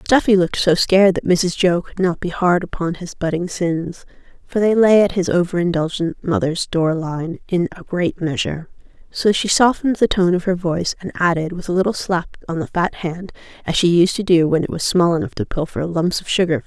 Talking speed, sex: 230 wpm, female